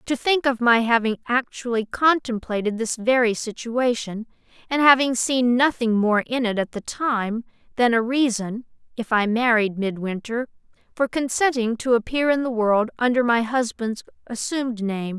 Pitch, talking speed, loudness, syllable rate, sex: 235 Hz, 155 wpm, -21 LUFS, 4.3 syllables/s, female